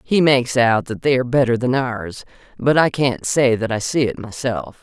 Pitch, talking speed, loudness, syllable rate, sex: 125 Hz, 225 wpm, -18 LUFS, 5.0 syllables/s, female